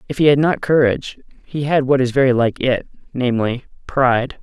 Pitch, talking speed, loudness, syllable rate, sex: 130 Hz, 190 wpm, -17 LUFS, 5.7 syllables/s, male